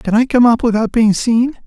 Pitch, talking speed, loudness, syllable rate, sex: 230 Hz, 255 wpm, -13 LUFS, 5.2 syllables/s, male